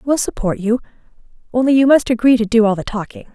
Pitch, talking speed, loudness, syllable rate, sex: 230 Hz, 215 wpm, -16 LUFS, 6.5 syllables/s, female